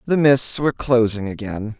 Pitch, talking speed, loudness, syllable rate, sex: 120 Hz, 165 wpm, -19 LUFS, 4.8 syllables/s, male